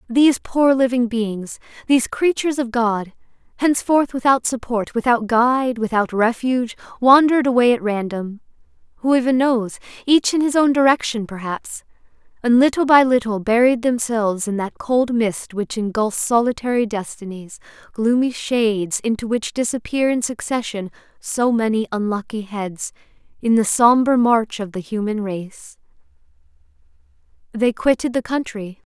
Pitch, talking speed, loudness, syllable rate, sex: 235 Hz, 130 wpm, -19 LUFS, 4.8 syllables/s, female